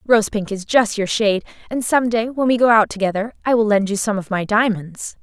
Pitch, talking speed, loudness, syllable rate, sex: 215 Hz, 255 wpm, -18 LUFS, 5.5 syllables/s, female